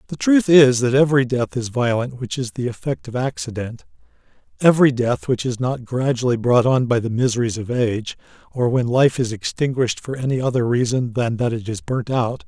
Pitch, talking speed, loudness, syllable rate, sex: 125 Hz, 200 wpm, -19 LUFS, 5.5 syllables/s, male